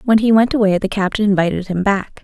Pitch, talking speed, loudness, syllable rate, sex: 205 Hz, 240 wpm, -16 LUFS, 6.1 syllables/s, female